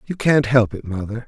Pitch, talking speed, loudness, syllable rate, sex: 120 Hz, 235 wpm, -19 LUFS, 5.2 syllables/s, male